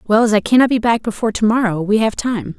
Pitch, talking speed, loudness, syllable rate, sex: 220 Hz, 280 wpm, -16 LUFS, 6.4 syllables/s, female